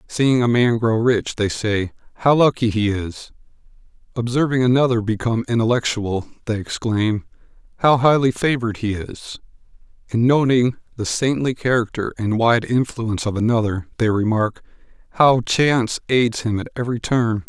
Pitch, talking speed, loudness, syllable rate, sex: 115 Hz, 140 wpm, -19 LUFS, 4.9 syllables/s, male